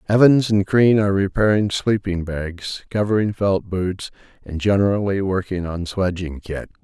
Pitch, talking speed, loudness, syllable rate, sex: 95 Hz, 140 wpm, -20 LUFS, 4.6 syllables/s, male